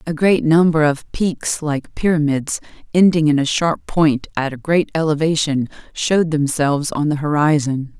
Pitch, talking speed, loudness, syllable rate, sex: 155 Hz, 160 wpm, -17 LUFS, 4.6 syllables/s, female